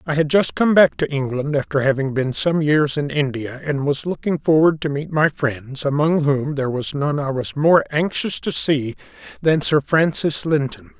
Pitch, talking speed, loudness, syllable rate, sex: 145 Hz, 200 wpm, -19 LUFS, 4.7 syllables/s, male